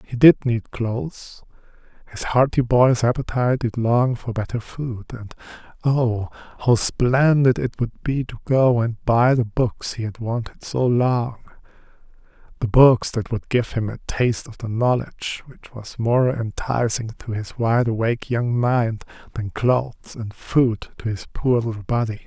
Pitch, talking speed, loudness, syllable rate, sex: 120 Hz, 160 wpm, -21 LUFS, 4.2 syllables/s, male